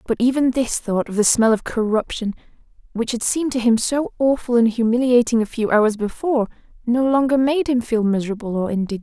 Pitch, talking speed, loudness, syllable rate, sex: 235 Hz, 200 wpm, -19 LUFS, 5.8 syllables/s, female